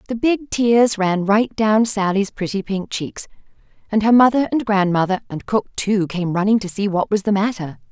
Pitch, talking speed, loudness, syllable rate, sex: 205 Hz, 195 wpm, -18 LUFS, 4.8 syllables/s, female